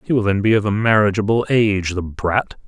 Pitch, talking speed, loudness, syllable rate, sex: 105 Hz, 225 wpm, -18 LUFS, 5.6 syllables/s, male